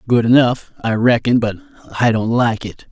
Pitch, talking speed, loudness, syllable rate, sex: 125 Hz, 185 wpm, -16 LUFS, 5.0 syllables/s, male